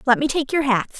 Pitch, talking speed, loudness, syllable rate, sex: 265 Hz, 300 wpm, -20 LUFS, 6.1 syllables/s, female